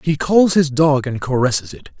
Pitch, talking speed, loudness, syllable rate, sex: 140 Hz, 210 wpm, -16 LUFS, 5.4 syllables/s, male